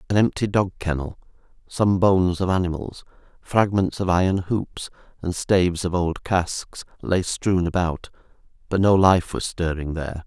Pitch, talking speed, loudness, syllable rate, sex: 90 Hz, 150 wpm, -22 LUFS, 4.6 syllables/s, male